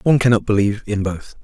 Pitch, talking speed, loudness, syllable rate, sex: 105 Hz, 210 wpm, -18 LUFS, 7.1 syllables/s, male